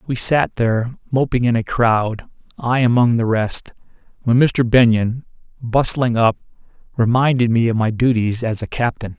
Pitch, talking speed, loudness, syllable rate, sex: 120 Hz, 155 wpm, -17 LUFS, 4.7 syllables/s, male